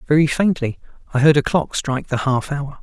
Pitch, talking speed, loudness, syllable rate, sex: 140 Hz, 215 wpm, -19 LUFS, 5.7 syllables/s, male